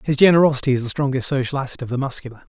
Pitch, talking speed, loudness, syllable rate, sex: 135 Hz, 235 wpm, -19 LUFS, 8.0 syllables/s, male